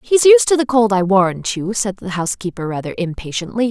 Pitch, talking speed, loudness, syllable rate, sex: 205 Hz, 210 wpm, -16 LUFS, 5.8 syllables/s, female